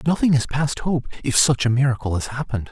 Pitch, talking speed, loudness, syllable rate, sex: 135 Hz, 220 wpm, -20 LUFS, 6.4 syllables/s, male